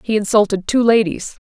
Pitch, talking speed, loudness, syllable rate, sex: 210 Hz, 165 wpm, -16 LUFS, 5.4 syllables/s, female